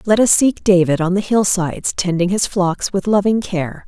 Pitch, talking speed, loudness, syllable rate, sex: 190 Hz, 200 wpm, -16 LUFS, 4.8 syllables/s, female